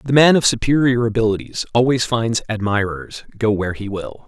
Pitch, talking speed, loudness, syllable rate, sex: 115 Hz, 170 wpm, -18 LUFS, 5.3 syllables/s, male